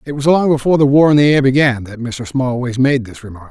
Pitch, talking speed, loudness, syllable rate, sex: 130 Hz, 275 wpm, -14 LUFS, 6.5 syllables/s, male